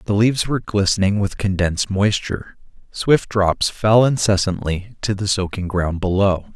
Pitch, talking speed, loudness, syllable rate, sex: 100 Hz, 145 wpm, -19 LUFS, 4.9 syllables/s, male